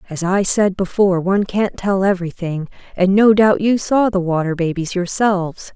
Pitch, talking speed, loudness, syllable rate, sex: 190 Hz, 175 wpm, -17 LUFS, 5.1 syllables/s, female